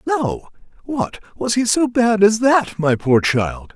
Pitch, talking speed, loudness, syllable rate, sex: 195 Hz, 175 wpm, -17 LUFS, 3.5 syllables/s, male